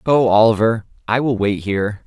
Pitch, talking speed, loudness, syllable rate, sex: 110 Hz, 175 wpm, -17 LUFS, 5.1 syllables/s, male